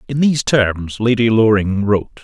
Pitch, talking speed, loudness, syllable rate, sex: 115 Hz, 160 wpm, -15 LUFS, 5.2 syllables/s, male